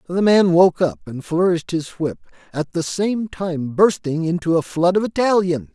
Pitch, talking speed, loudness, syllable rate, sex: 175 Hz, 190 wpm, -19 LUFS, 4.6 syllables/s, male